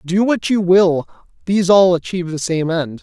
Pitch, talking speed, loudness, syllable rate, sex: 180 Hz, 200 wpm, -16 LUFS, 5.1 syllables/s, male